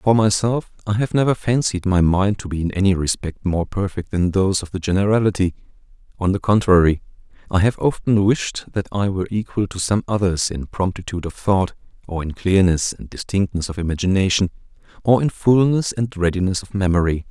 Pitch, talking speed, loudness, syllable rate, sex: 95 Hz, 180 wpm, -19 LUFS, 5.6 syllables/s, male